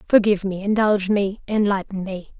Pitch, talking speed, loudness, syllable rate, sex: 200 Hz, 150 wpm, -21 LUFS, 5.5 syllables/s, female